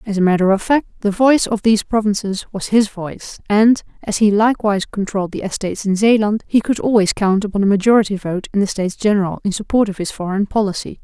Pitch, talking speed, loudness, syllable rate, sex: 205 Hz, 220 wpm, -17 LUFS, 6.4 syllables/s, female